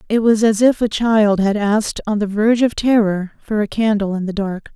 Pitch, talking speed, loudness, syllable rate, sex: 210 Hz, 240 wpm, -17 LUFS, 5.3 syllables/s, female